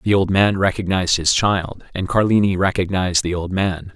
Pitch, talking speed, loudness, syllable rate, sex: 95 Hz, 180 wpm, -18 LUFS, 5.3 syllables/s, male